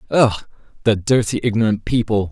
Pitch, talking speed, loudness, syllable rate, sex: 110 Hz, 130 wpm, -18 LUFS, 5.8 syllables/s, male